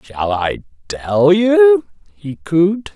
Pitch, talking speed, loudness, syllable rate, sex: 165 Hz, 120 wpm, -14 LUFS, 2.7 syllables/s, male